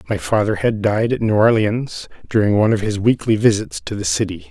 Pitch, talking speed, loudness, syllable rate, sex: 110 Hz, 215 wpm, -17 LUFS, 5.6 syllables/s, male